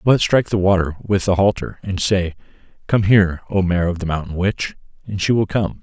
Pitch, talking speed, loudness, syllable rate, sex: 95 Hz, 215 wpm, -18 LUFS, 5.5 syllables/s, male